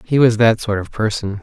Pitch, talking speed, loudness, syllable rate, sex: 110 Hz, 255 wpm, -16 LUFS, 5.3 syllables/s, male